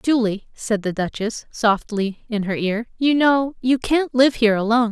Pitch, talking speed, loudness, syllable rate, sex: 230 Hz, 185 wpm, -20 LUFS, 4.6 syllables/s, female